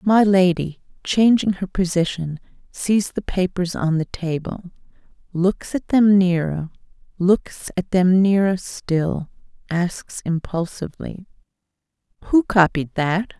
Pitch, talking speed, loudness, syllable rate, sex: 185 Hz, 100 wpm, -20 LUFS, 3.8 syllables/s, female